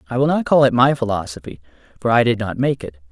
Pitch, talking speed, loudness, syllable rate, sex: 125 Hz, 250 wpm, -18 LUFS, 6.6 syllables/s, male